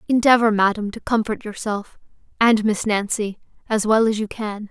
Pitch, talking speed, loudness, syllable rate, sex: 215 Hz, 165 wpm, -20 LUFS, 5.0 syllables/s, female